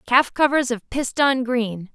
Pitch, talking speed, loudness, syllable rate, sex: 250 Hz, 155 wpm, -20 LUFS, 4.6 syllables/s, female